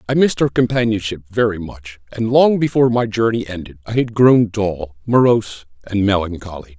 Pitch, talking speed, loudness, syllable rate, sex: 105 Hz, 170 wpm, -17 LUFS, 5.4 syllables/s, male